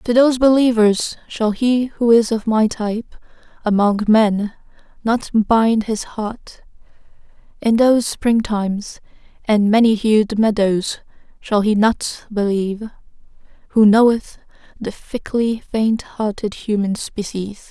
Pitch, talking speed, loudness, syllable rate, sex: 220 Hz, 120 wpm, -17 LUFS, 3.8 syllables/s, female